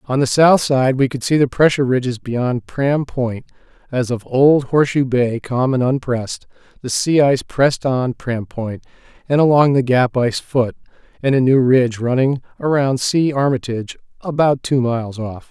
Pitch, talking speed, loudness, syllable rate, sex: 130 Hz, 170 wpm, -17 LUFS, 4.9 syllables/s, male